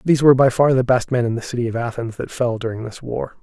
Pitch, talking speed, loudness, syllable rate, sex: 120 Hz, 295 wpm, -19 LUFS, 6.8 syllables/s, male